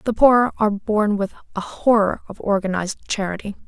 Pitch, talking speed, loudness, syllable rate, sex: 210 Hz, 165 wpm, -20 LUFS, 5.5 syllables/s, female